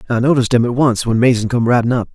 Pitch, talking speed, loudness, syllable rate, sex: 120 Hz, 280 wpm, -15 LUFS, 7.3 syllables/s, male